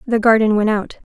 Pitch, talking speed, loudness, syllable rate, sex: 220 Hz, 215 wpm, -16 LUFS, 5.6 syllables/s, female